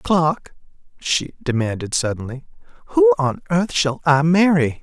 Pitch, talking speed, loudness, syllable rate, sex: 140 Hz, 125 wpm, -19 LUFS, 4.2 syllables/s, male